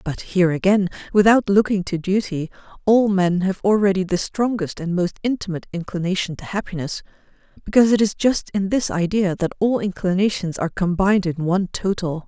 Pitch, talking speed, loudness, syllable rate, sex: 190 Hz, 165 wpm, -20 LUFS, 5.7 syllables/s, female